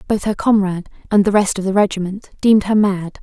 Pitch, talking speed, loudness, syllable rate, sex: 200 Hz, 225 wpm, -16 LUFS, 6.2 syllables/s, female